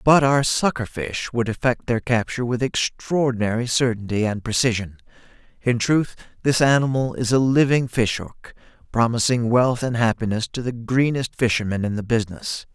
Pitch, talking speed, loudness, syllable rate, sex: 120 Hz, 145 wpm, -21 LUFS, 5.1 syllables/s, male